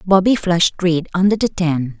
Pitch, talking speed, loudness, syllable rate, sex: 175 Hz, 180 wpm, -16 LUFS, 5.2 syllables/s, female